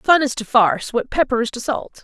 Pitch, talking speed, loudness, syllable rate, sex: 240 Hz, 265 wpm, -19 LUFS, 5.7 syllables/s, female